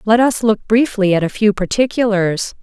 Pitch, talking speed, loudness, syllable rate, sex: 215 Hz, 185 wpm, -15 LUFS, 4.8 syllables/s, female